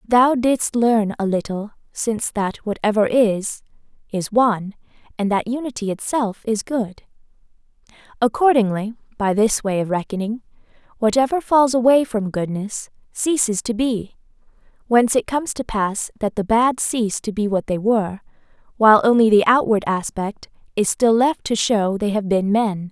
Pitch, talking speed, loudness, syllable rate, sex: 220 Hz, 155 wpm, -19 LUFS, 4.8 syllables/s, female